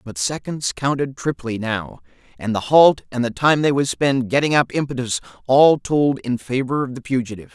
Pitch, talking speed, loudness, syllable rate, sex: 130 Hz, 190 wpm, -19 LUFS, 5.1 syllables/s, male